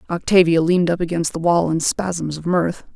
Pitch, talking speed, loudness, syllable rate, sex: 170 Hz, 205 wpm, -18 LUFS, 5.2 syllables/s, female